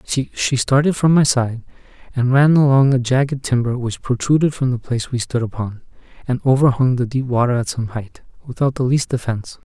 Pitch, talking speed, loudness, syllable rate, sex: 125 Hz, 190 wpm, -18 LUFS, 5.4 syllables/s, male